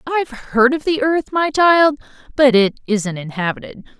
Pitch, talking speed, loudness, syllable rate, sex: 265 Hz, 165 wpm, -16 LUFS, 4.6 syllables/s, female